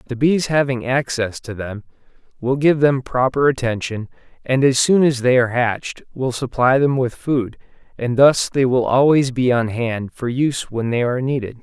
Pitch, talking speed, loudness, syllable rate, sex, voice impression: 125 Hz, 190 wpm, -18 LUFS, 4.9 syllables/s, male, masculine, slightly young, adult-like, thick, tensed, slightly weak, slightly bright, hard, slightly clear, slightly fluent, cool, slightly intellectual, refreshing, sincere, calm, slightly mature, friendly, reassuring, slightly unique, slightly elegant, slightly wild, slightly sweet, kind, very modest